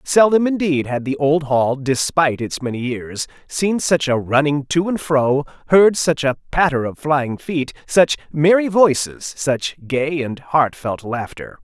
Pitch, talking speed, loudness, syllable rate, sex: 150 Hz, 170 wpm, -18 LUFS, 4.0 syllables/s, male